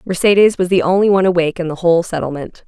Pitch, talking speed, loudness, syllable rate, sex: 175 Hz, 225 wpm, -14 LUFS, 7.4 syllables/s, female